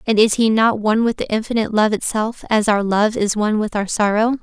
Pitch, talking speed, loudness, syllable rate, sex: 215 Hz, 230 wpm, -17 LUFS, 5.9 syllables/s, female